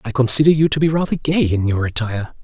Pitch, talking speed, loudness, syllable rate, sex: 130 Hz, 245 wpm, -17 LUFS, 6.6 syllables/s, male